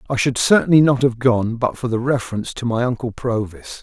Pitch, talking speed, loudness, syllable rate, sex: 120 Hz, 220 wpm, -18 LUFS, 5.8 syllables/s, male